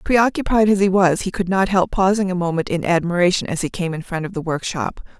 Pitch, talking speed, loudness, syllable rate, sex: 185 Hz, 240 wpm, -19 LUFS, 5.9 syllables/s, female